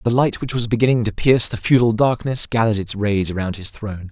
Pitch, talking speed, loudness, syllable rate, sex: 110 Hz, 235 wpm, -18 LUFS, 6.2 syllables/s, male